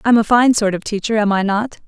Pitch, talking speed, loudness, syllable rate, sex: 215 Hz, 290 wpm, -16 LUFS, 5.9 syllables/s, female